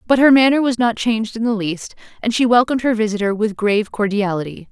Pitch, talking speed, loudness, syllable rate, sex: 225 Hz, 215 wpm, -17 LUFS, 6.3 syllables/s, female